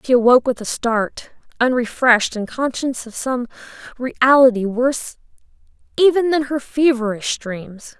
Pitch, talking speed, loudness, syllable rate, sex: 250 Hz, 130 wpm, -18 LUFS, 4.5 syllables/s, female